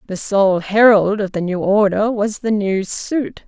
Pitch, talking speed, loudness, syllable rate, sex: 205 Hz, 190 wpm, -16 LUFS, 4.0 syllables/s, female